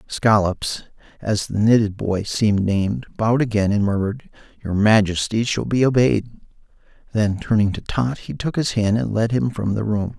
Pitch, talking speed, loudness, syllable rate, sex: 110 Hz, 175 wpm, -20 LUFS, 4.9 syllables/s, male